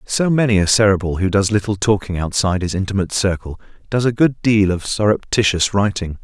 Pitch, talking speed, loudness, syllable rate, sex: 100 Hz, 185 wpm, -17 LUFS, 5.9 syllables/s, male